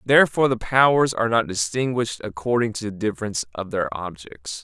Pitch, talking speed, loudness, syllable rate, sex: 110 Hz, 170 wpm, -22 LUFS, 6.2 syllables/s, male